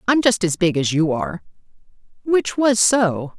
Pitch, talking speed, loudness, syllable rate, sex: 185 Hz, 175 wpm, -18 LUFS, 4.7 syllables/s, female